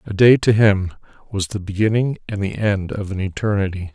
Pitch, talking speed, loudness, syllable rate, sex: 100 Hz, 200 wpm, -19 LUFS, 5.3 syllables/s, male